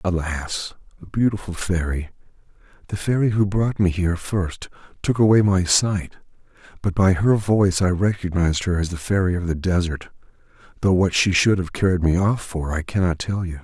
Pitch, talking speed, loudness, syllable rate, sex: 90 Hz, 175 wpm, -21 LUFS, 5.1 syllables/s, male